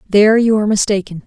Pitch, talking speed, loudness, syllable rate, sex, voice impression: 205 Hz, 190 wpm, -14 LUFS, 7.1 syllables/s, female, very feminine, slightly young, adult-like, thin, slightly relaxed, slightly powerful, slightly bright, slightly hard, clear, very fluent, slightly raspy, very cute, slightly cool, very intellectual, refreshing, sincere, slightly calm, very friendly, reassuring, very unique, elegant, slightly wild, sweet, lively, slightly strict, intense, slightly sharp, light